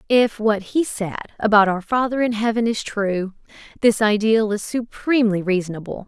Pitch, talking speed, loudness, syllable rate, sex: 215 Hz, 160 wpm, -20 LUFS, 5.0 syllables/s, female